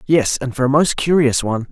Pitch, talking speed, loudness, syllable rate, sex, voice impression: 130 Hz, 245 wpm, -16 LUFS, 5.7 syllables/s, male, masculine, middle-aged, powerful, bright, raspy, friendly, slightly unique, wild, lively, intense, slightly light